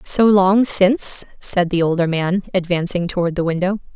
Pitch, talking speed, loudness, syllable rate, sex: 185 Hz, 165 wpm, -17 LUFS, 4.8 syllables/s, female